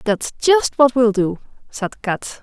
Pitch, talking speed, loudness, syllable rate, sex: 240 Hz, 175 wpm, -18 LUFS, 3.5 syllables/s, female